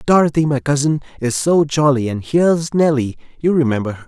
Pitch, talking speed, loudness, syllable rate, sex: 145 Hz, 160 wpm, -17 LUFS, 5.7 syllables/s, male